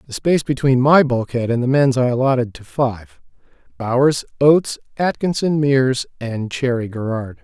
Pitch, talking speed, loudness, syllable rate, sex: 130 Hz, 155 wpm, -18 LUFS, 5.0 syllables/s, male